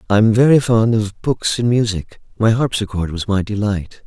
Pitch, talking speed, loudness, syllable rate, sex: 110 Hz, 190 wpm, -17 LUFS, 4.9 syllables/s, male